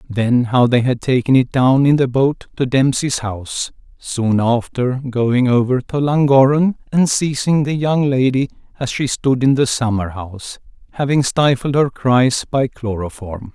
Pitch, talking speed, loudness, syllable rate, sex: 130 Hz, 165 wpm, -16 LUFS, 4.3 syllables/s, male